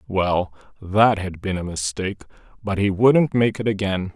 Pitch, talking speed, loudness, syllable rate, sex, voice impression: 100 Hz, 175 wpm, -21 LUFS, 4.5 syllables/s, male, masculine, adult-like, relaxed, slightly muffled, raspy, calm, mature, friendly, reassuring, wild, kind, modest